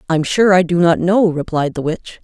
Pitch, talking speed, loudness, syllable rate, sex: 175 Hz, 240 wpm, -15 LUFS, 4.9 syllables/s, female